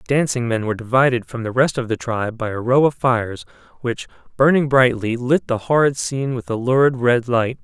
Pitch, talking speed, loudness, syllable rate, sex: 125 Hz, 220 wpm, -19 LUFS, 5.6 syllables/s, male